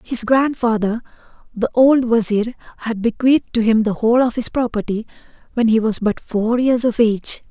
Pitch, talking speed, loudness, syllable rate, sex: 230 Hz, 175 wpm, -17 LUFS, 5.2 syllables/s, female